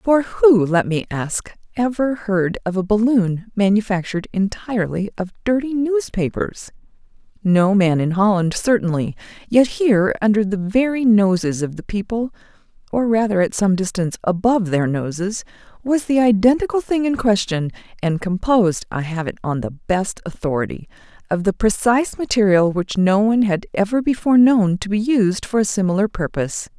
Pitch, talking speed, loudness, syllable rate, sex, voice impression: 205 Hz, 155 wpm, -18 LUFS, 5.1 syllables/s, female, very feminine, adult-like, slightly fluent, slightly intellectual, slightly calm, sweet